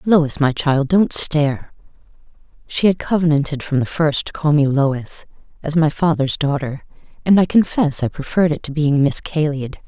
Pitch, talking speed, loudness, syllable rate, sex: 150 Hz, 170 wpm, -17 LUFS, 5.0 syllables/s, female